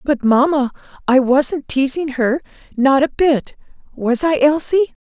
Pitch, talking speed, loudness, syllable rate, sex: 280 Hz, 140 wpm, -16 LUFS, 4.0 syllables/s, female